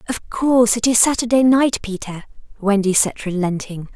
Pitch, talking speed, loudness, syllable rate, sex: 220 Hz, 150 wpm, -17 LUFS, 5.2 syllables/s, female